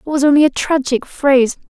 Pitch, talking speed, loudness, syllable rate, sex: 280 Hz, 210 wpm, -14 LUFS, 6.0 syllables/s, female